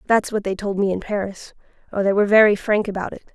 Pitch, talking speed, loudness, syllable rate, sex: 200 Hz, 250 wpm, -20 LUFS, 6.7 syllables/s, female